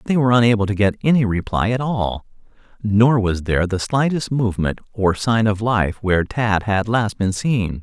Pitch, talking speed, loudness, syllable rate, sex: 110 Hz, 190 wpm, -19 LUFS, 5.1 syllables/s, male